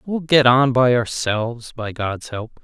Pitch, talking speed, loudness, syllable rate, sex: 120 Hz, 180 wpm, -18 LUFS, 4.2 syllables/s, male